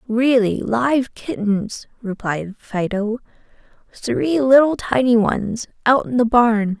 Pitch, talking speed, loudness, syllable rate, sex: 230 Hz, 115 wpm, -18 LUFS, 3.4 syllables/s, female